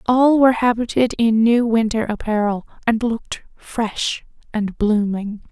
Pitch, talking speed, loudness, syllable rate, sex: 225 Hz, 130 wpm, -19 LUFS, 4.3 syllables/s, female